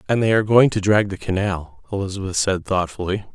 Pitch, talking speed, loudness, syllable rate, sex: 100 Hz, 195 wpm, -20 LUFS, 5.9 syllables/s, male